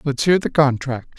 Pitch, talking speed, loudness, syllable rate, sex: 140 Hz, 200 wpm, -18 LUFS, 5.0 syllables/s, male